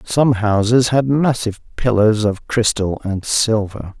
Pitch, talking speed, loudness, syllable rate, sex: 110 Hz, 135 wpm, -17 LUFS, 4.1 syllables/s, male